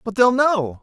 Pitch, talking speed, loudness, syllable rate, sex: 220 Hz, 220 wpm, -17 LUFS, 4.1 syllables/s, male